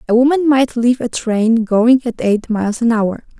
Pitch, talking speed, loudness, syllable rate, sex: 235 Hz, 210 wpm, -15 LUFS, 4.9 syllables/s, female